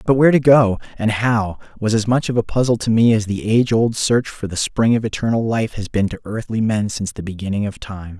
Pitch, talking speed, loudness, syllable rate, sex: 110 Hz, 255 wpm, -18 LUFS, 5.8 syllables/s, male